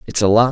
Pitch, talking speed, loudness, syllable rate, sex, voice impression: 115 Hz, 345 wpm, -15 LUFS, 7.1 syllables/s, male, very masculine, slightly young, adult-like, dark, slightly soft, slightly muffled, fluent, cool, intellectual, very sincere, very calm, slightly mature, slightly friendly, slightly reassuring, slightly sweet, slightly kind, slightly modest